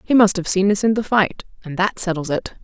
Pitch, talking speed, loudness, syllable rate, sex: 195 Hz, 275 wpm, -18 LUFS, 5.7 syllables/s, female